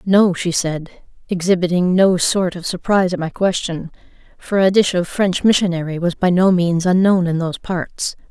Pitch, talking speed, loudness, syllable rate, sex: 180 Hz, 180 wpm, -17 LUFS, 5.0 syllables/s, female